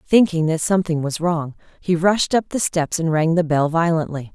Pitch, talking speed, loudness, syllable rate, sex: 165 Hz, 205 wpm, -19 LUFS, 5.1 syllables/s, female